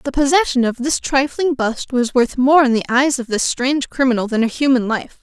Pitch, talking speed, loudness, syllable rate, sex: 260 Hz, 230 wpm, -17 LUFS, 5.4 syllables/s, female